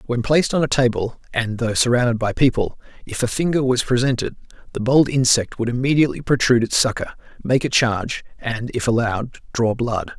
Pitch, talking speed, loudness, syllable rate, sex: 120 Hz, 185 wpm, -19 LUFS, 5.8 syllables/s, male